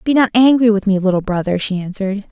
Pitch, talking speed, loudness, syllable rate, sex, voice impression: 210 Hz, 235 wpm, -15 LUFS, 6.4 syllables/s, female, feminine, slightly young, fluent, slightly cute, slightly calm, friendly